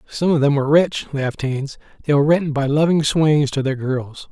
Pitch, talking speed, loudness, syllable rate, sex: 145 Hz, 220 wpm, -18 LUFS, 5.9 syllables/s, male